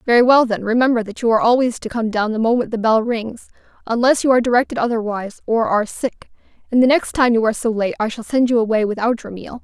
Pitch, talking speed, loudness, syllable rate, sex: 230 Hz, 250 wpm, -17 LUFS, 6.6 syllables/s, female